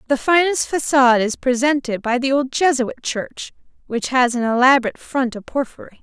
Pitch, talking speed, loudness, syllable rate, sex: 260 Hz, 170 wpm, -18 LUFS, 5.4 syllables/s, female